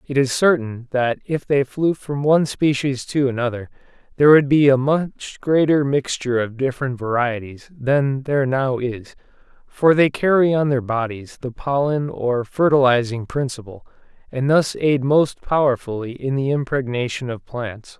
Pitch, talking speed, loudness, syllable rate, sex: 135 Hz, 155 wpm, -19 LUFS, 4.6 syllables/s, male